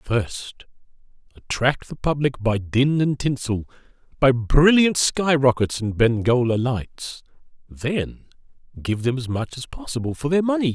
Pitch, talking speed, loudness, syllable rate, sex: 130 Hz, 140 wpm, -21 LUFS, 4.2 syllables/s, male